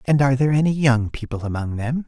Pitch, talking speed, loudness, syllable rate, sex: 130 Hz, 230 wpm, -20 LUFS, 6.7 syllables/s, male